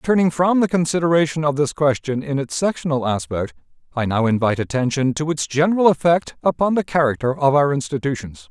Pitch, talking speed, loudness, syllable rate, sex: 145 Hz, 175 wpm, -19 LUFS, 5.9 syllables/s, male